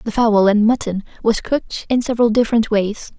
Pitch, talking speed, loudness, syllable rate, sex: 225 Hz, 190 wpm, -17 LUFS, 5.5 syllables/s, female